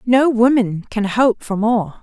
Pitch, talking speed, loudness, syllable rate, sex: 225 Hz, 180 wpm, -16 LUFS, 3.7 syllables/s, female